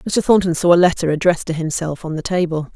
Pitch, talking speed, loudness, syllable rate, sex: 170 Hz, 240 wpm, -17 LUFS, 6.3 syllables/s, female